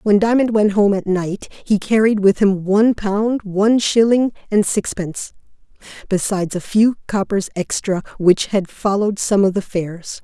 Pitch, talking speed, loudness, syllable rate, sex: 205 Hz, 165 wpm, -17 LUFS, 4.8 syllables/s, female